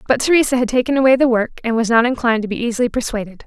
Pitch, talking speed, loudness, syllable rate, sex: 240 Hz, 260 wpm, -16 LUFS, 7.8 syllables/s, female